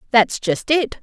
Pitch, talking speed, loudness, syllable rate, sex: 245 Hz, 175 wpm, -18 LUFS, 4.2 syllables/s, female